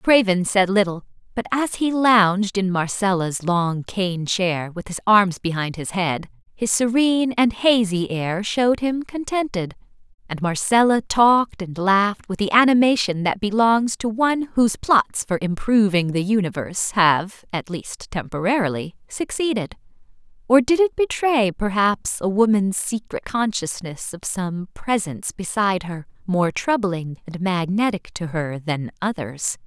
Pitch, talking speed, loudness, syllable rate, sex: 200 Hz, 145 wpm, -20 LUFS, 4.4 syllables/s, female